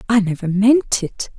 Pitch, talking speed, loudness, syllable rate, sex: 210 Hz, 175 wpm, -17 LUFS, 4.3 syllables/s, female